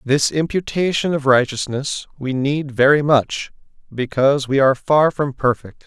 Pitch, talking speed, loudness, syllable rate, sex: 140 Hz, 145 wpm, -18 LUFS, 4.5 syllables/s, male